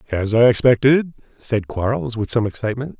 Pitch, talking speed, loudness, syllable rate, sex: 115 Hz, 160 wpm, -18 LUFS, 5.5 syllables/s, male